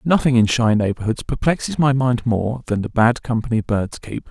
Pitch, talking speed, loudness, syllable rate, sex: 115 Hz, 195 wpm, -19 LUFS, 5.1 syllables/s, male